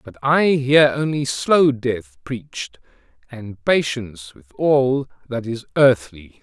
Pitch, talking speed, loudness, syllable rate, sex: 125 Hz, 130 wpm, -19 LUFS, 3.6 syllables/s, male